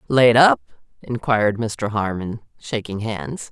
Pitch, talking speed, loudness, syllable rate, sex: 110 Hz, 120 wpm, -20 LUFS, 4.0 syllables/s, female